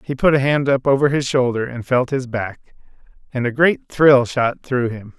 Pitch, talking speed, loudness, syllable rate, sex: 130 Hz, 220 wpm, -18 LUFS, 4.8 syllables/s, male